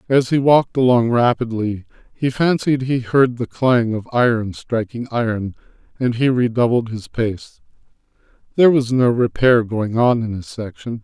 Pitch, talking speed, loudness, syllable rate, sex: 120 Hz, 160 wpm, -18 LUFS, 4.6 syllables/s, male